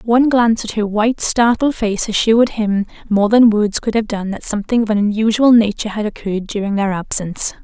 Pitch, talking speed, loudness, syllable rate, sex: 215 Hz, 205 wpm, -16 LUFS, 5.9 syllables/s, female